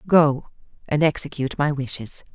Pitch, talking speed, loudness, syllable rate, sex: 145 Hz, 130 wpm, -22 LUFS, 5.1 syllables/s, female